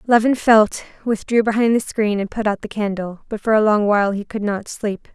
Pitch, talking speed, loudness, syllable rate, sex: 215 Hz, 235 wpm, -19 LUFS, 5.3 syllables/s, female